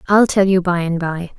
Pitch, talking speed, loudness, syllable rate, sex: 180 Hz, 260 wpm, -16 LUFS, 5.0 syllables/s, female